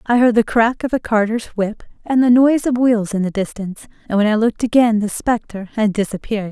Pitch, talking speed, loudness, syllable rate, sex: 220 Hz, 230 wpm, -17 LUFS, 6.0 syllables/s, female